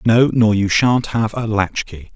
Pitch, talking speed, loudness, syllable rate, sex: 110 Hz, 195 wpm, -16 LUFS, 4.0 syllables/s, male